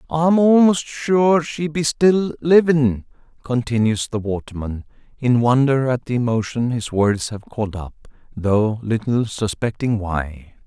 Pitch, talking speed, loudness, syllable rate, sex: 125 Hz, 135 wpm, -19 LUFS, 3.8 syllables/s, male